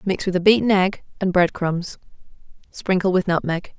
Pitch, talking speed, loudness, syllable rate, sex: 185 Hz, 175 wpm, -20 LUFS, 5.0 syllables/s, female